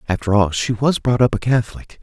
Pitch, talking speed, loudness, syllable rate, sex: 115 Hz, 235 wpm, -18 LUFS, 6.0 syllables/s, male